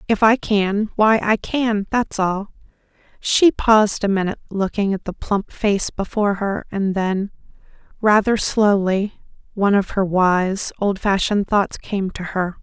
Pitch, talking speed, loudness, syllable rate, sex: 200 Hz, 145 wpm, -19 LUFS, 4.1 syllables/s, female